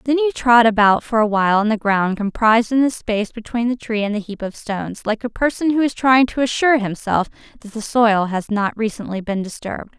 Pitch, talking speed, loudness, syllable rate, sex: 225 Hz, 230 wpm, -18 LUFS, 5.7 syllables/s, female